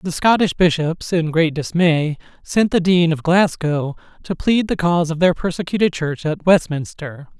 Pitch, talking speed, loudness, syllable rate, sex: 165 Hz, 170 wpm, -18 LUFS, 4.7 syllables/s, male